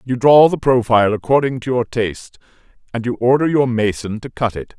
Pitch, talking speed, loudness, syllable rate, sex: 120 Hz, 200 wpm, -16 LUFS, 5.5 syllables/s, male